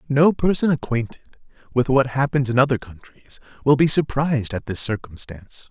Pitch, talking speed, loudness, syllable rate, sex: 130 Hz, 160 wpm, -20 LUFS, 5.2 syllables/s, male